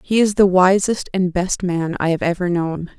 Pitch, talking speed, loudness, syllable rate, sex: 180 Hz, 220 wpm, -18 LUFS, 4.7 syllables/s, female